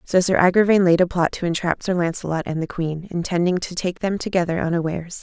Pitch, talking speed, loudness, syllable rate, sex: 175 Hz, 220 wpm, -21 LUFS, 6.1 syllables/s, female